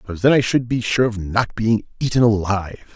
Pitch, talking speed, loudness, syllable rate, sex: 110 Hz, 225 wpm, -19 LUFS, 6.3 syllables/s, male